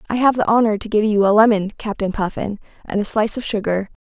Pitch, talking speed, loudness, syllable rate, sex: 210 Hz, 235 wpm, -18 LUFS, 6.5 syllables/s, female